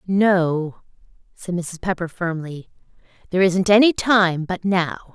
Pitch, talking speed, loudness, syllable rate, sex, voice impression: 180 Hz, 130 wpm, -19 LUFS, 4.1 syllables/s, female, feminine, adult-like, clear, slightly cute, slightly unique, lively